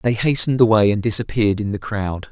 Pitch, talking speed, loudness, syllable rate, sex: 110 Hz, 205 wpm, -18 LUFS, 6.2 syllables/s, male